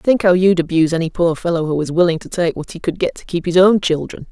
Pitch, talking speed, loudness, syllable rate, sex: 170 Hz, 290 wpm, -16 LUFS, 6.3 syllables/s, female